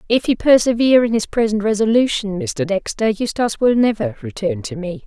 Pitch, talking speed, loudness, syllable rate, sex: 215 Hz, 180 wpm, -17 LUFS, 5.6 syllables/s, female